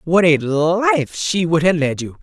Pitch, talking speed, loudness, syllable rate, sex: 165 Hz, 215 wpm, -16 LUFS, 3.8 syllables/s, female